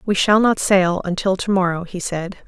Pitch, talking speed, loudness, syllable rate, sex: 190 Hz, 220 wpm, -18 LUFS, 4.9 syllables/s, female